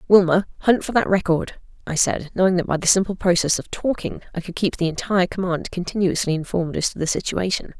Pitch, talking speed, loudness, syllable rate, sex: 180 Hz, 210 wpm, -21 LUFS, 6.1 syllables/s, female